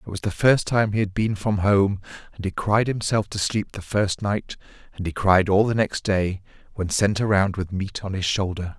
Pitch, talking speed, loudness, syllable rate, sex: 100 Hz, 230 wpm, -22 LUFS, 4.9 syllables/s, male